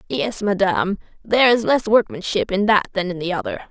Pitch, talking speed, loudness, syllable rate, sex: 200 Hz, 195 wpm, -19 LUFS, 5.6 syllables/s, female